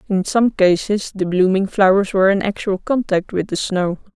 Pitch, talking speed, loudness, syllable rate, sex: 195 Hz, 190 wpm, -17 LUFS, 5.0 syllables/s, female